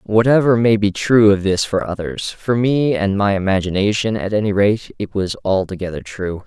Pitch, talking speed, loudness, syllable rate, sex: 105 Hz, 185 wpm, -17 LUFS, 4.9 syllables/s, male